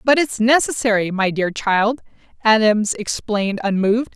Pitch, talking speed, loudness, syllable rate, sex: 220 Hz, 130 wpm, -18 LUFS, 4.7 syllables/s, female